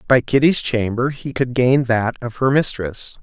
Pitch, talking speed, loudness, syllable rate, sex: 125 Hz, 185 wpm, -18 LUFS, 4.3 syllables/s, male